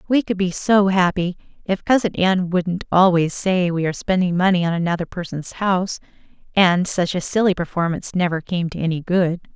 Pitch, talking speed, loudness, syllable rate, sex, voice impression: 180 Hz, 180 wpm, -19 LUFS, 5.4 syllables/s, female, very feminine, very adult-like, middle-aged, thin, tensed, slightly powerful, bright, slightly hard, very clear, fluent, cool, intellectual, slightly refreshing, sincere, calm, slightly friendly, slightly reassuring, slightly unique, elegant, slightly lively, slightly kind, slightly modest